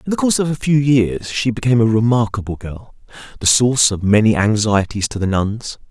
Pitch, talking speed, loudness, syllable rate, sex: 115 Hz, 205 wpm, -16 LUFS, 5.7 syllables/s, male